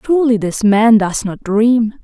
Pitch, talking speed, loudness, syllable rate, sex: 225 Hz, 175 wpm, -13 LUFS, 4.3 syllables/s, female